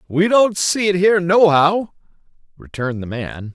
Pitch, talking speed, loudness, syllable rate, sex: 170 Hz, 150 wpm, -16 LUFS, 4.7 syllables/s, male